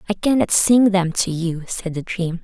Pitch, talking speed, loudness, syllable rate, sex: 185 Hz, 220 wpm, -18 LUFS, 4.6 syllables/s, female